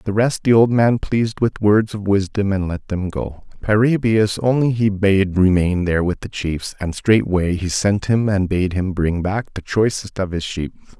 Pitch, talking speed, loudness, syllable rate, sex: 100 Hz, 205 wpm, -18 LUFS, 4.6 syllables/s, male